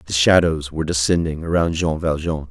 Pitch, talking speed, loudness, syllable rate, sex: 80 Hz, 170 wpm, -19 LUFS, 5.3 syllables/s, male